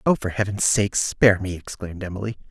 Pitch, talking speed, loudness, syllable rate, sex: 100 Hz, 190 wpm, -22 LUFS, 6.1 syllables/s, male